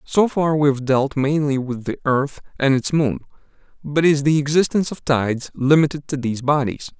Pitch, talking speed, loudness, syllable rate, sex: 140 Hz, 190 wpm, -19 LUFS, 5.2 syllables/s, male